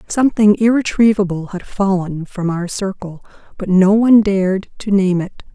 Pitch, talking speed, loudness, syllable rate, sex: 195 Hz, 150 wpm, -15 LUFS, 4.9 syllables/s, female